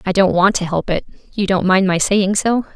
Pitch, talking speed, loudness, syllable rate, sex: 190 Hz, 260 wpm, -16 LUFS, 5.2 syllables/s, female